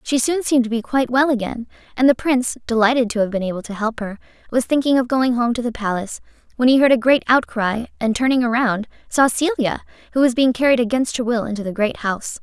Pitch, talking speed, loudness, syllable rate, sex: 240 Hz, 235 wpm, -19 LUFS, 6.4 syllables/s, female